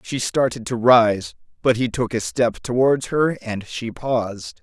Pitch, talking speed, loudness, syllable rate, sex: 120 Hz, 180 wpm, -20 LUFS, 4.0 syllables/s, male